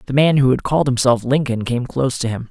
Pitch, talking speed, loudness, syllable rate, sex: 130 Hz, 265 wpm, -17 LUFS, 6.4 syllables/s, male